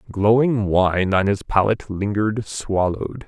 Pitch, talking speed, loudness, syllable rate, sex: 105 Hz, 130 wpm, -20 LUFS, 4.6 syllables/s, male